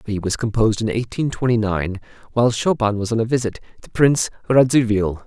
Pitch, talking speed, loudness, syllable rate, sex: 115 Hz, 180 wpm, -19 LUFS, 5.8 syllables/s, male